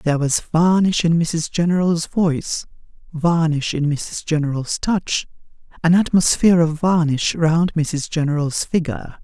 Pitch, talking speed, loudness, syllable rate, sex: 165 Hz, 130 wpm, -18 LUFS, 4.5 syllables/s, female